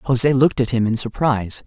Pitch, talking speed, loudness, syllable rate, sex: 125 Hz, 215 wpm, -18 LUFS, 6.0 syllables/s, male